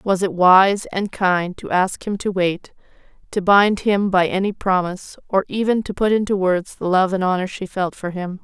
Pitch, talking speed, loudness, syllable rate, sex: 190 Hz, 215 wpm, -19 LUFS, 4.7 syllables/s, female